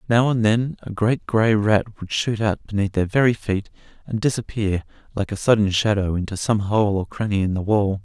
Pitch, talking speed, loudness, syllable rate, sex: 105 Hz, 210 wpm, -21 LUFS, 5.2 syllables/s, male